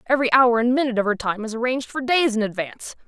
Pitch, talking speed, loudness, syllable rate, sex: 240 Hz, 255 wpm, -21 LUFS, 7.4 syllables/s, female